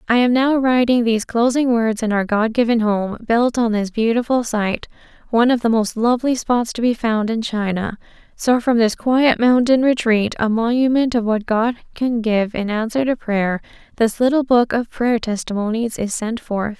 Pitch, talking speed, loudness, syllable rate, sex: 230 Hz, 195 wpm, -18 LUFS, 4.8 syllables/s, female